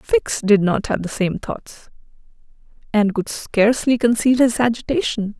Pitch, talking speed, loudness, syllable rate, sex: 230 Hz, 145 wpm, -18 LUFS, 4.4 syllables/s, female